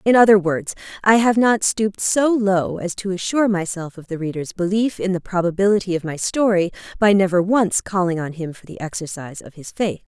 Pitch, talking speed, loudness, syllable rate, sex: 190 Hz, 205 wpm, -19 LUFS, 5.6 syllables/s, female